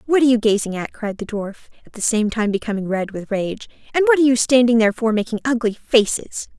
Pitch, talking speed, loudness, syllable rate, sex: 225 Hz, 235 wpm, -19 LUFS, 6.3 syllables/s, female